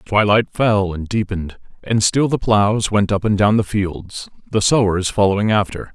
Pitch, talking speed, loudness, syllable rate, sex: 100 Hz, 180 wpm, -17 LUFS, 4.6 syllables/s, male